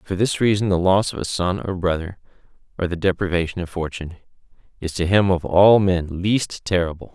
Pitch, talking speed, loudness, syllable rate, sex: 90 Hz, 200 wpm, -20 LUFS, 5.7 syllables/s, male